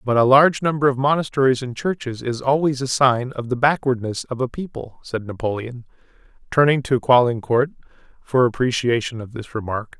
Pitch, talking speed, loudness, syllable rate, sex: 130 Hz, 170 wpm, -20 LUFS, 5.4 syllables/s, male